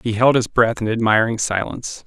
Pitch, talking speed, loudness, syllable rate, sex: 115 Hz, 205 wpm, -18 LUFS, 5.4 syllables/s, male